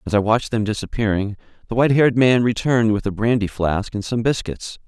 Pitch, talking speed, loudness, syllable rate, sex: 110 Hz, 210 wpm, -19 LUFS, 6.2 syllables/s, male